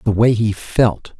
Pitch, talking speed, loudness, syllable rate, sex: 110 Hz, 200 wpm, -17 LUFS, 3.7 syllables/s, male